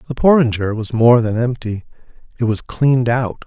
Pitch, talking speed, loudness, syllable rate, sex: 120 Hz, 175 wpm, -16 LUFS, 5.1 syllables/s, male